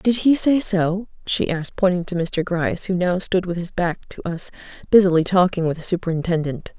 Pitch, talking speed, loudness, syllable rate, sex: 180 Hz, 205 wpm, -20 LUFS, 5.4 syllables/s, female